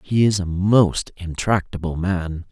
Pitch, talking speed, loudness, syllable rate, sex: 90 Hz, 145 wpm, -20 LUFS, 3.8 syllables/s, male